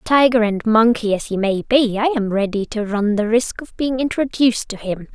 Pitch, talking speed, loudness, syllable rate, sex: 225 Hz, 220 wpm, -18 LUFS, 5.1 syllables/s, female